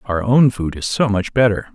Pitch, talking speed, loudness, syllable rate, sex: 110 Hz, 240 wpm, -17 LUFS, 4.9 syllables/s, male